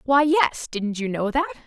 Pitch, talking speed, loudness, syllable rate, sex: 255 Hz, 215 wpm, -22 LUFS, 4.4 syllables/s, female